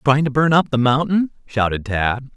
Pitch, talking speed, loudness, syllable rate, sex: 135 Hz, 205 wpm, -18 LUFS, 4.8 syllables/s, male